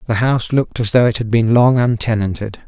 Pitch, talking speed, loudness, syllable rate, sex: 115 Hz, 225 wpm, -15 LUFS, 6.0 syllables/s, male